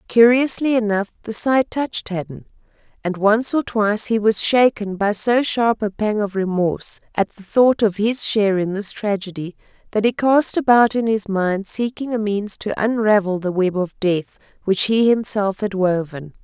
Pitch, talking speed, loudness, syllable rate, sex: 210 Hz, 185 wpm, -19 LUFS, 4.6 syllables/s, female